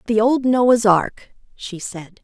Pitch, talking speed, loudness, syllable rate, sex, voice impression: 220 Hz, 160 wpm, -17 LUFS, 3.2 syllables/s, female, feminine, adult-like, slightly powerful, clear, slightly lively, slightly intense